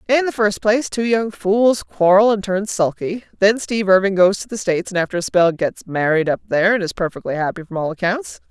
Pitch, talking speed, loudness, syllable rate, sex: 195 Hz, 235 wpm, -18 LUFS, 5.7 syllables/s, female